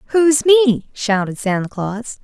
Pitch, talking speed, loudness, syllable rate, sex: 235 Hz, 135 wpm, -16 LUFS, 4.1 syllables/s, female